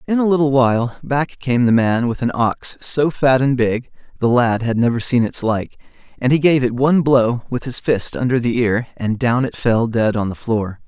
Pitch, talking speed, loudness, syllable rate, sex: 125 Hz, 230 wpm, -17 LUFS, 4.8 syllables/s, male